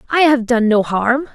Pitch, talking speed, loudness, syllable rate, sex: 245 Hz, 220 wpm, -15 LUFS, 4.7 syllables/s, female